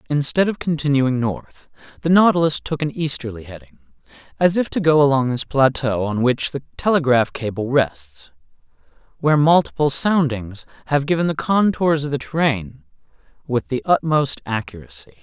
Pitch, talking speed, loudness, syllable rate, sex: 135 Hz, 145 wpm, -19 LUFS, 5.0 syllables/s, male